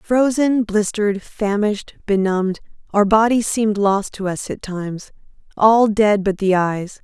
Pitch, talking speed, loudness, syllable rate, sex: 205 Hz, 135 wpm, -18 LUFS, 4.4 syllables/s, female